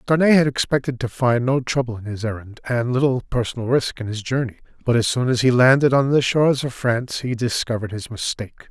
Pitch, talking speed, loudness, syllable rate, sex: 125 Hz, 220 wpm, -20 LUFS, 6.0 syllables/s, male